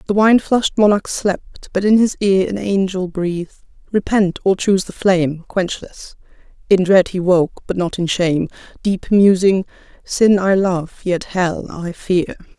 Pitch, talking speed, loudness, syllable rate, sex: 190 Hz, 155 wpm, -17 LUFS, 4.4 syllables/s, female